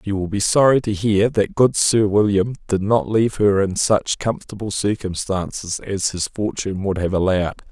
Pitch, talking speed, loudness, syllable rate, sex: 100 Hz, 185 wpm, -19 LUFS, 5.1 syllables/s, male